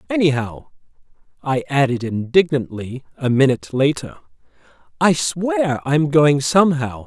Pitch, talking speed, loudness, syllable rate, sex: 140 Hz, 100 wpm, -18 LUFS, 4.5 syllables/s, male